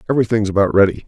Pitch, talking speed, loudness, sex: 105 Hz, 165 wpm, -16 LUFS, male